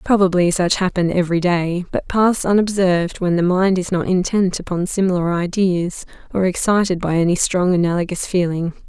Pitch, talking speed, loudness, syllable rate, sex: 180 Hz, 160 wpm, -18 LUFS, 5.3 syllables/s, female